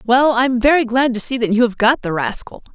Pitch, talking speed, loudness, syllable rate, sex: 245 Hz, 260 wpm, -16 LUFS, 5.5 syllables/s, female